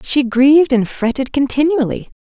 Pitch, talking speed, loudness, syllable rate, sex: 275 Hz, 135 wpm, -14 LUFS, 4.9 syllables/s, female